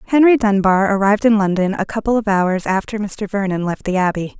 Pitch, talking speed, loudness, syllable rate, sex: 200 Hz, 205 wpm, -17 LUFS, 5.7 syllables/s, female